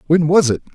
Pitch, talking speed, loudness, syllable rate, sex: 155 Hz, 240 wpm, -15 LUFS, 6.3 syllables/s, male